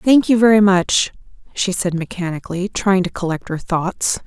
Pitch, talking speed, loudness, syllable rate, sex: 190 Hz, 170 wpm, -17 LUFS, 4.8 syllables/s, female